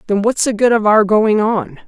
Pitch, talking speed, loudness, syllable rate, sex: 215 Hz, 255 wpm, -14 LUFS, 4.9 syllables/s, female